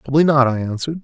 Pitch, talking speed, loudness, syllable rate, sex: 140 Hz, 230 wpm, -17 LUFS, 8.6 syllables/s, male